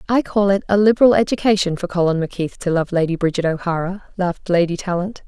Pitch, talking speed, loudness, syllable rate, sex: 185 Hz, 195 wpm, -18 LUFS, 6.6 syllables/s, female